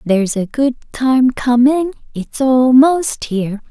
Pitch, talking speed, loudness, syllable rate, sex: 250 Hz, 130 wpm, -14 LUFS, 3.8 syllables/s, female